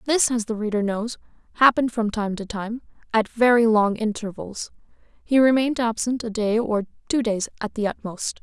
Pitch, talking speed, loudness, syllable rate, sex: 225 Hz, 180 wpm, -22 LUFS, 5.2 syllables/s, female